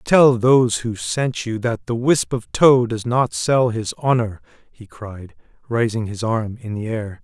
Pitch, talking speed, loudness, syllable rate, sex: 115 Hz, 190 wpm, -19 LUFS, 4.0 syllables/s, male